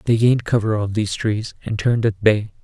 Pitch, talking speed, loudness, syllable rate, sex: 110 Hz, 230 wpm, -19 LUFS, 6.1 syllables/s, male